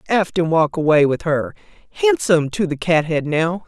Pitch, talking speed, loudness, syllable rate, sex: 170 Hz, 180 wpm, -18 LUFS, 5.0 syllables/s, female